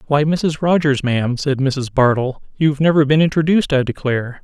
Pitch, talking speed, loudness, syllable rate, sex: 145 Hz, 175 wpm, -17 LUFS, 5.7 syllables/s, male